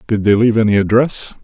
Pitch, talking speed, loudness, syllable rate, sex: 110 Hz, 210 wpm, -13 LUFS, 6.5 syllables/s, male